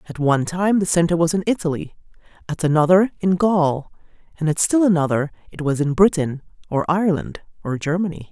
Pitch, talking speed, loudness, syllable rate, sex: 170 Hz, 175 wpm, -19 LUFS, 5.8 syllables/s, female